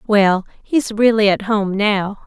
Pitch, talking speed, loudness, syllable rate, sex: 205 Hz, 160 wpm, -16 LUFS, 3.6 syllables/s, female